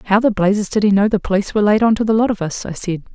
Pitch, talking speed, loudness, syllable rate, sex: 205 Hz, 345 wpm, -16 LUFS, 7.3 syllables/s, female